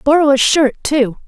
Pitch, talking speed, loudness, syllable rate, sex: 275 Hz, 190 wpm, -13 LUFS, 4.5 syllables/s, female